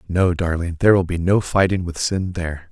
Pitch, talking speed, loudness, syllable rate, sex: 90 Hz, 220 wpm, -19 LUFS, 5.6 syllables/s, male